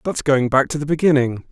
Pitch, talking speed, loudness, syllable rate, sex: 140 Hz, 240 wpm, -18 LUFS, 5.8 syllables/s, male